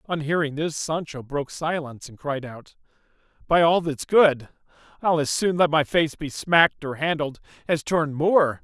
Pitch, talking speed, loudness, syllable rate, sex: 150 Hz, 180 wpm, -23 LUFS, 4.7 syllables/s, male